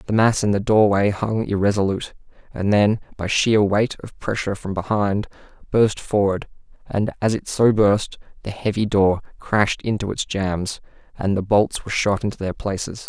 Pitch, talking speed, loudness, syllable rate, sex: 100 Hz, 175 wpm, -21 LUFS, 5.0 syllables/s, male